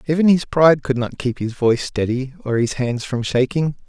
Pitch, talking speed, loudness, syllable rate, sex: 135 Hz, 215 wpm, -19 LUFS, 5.3 syllables/s, male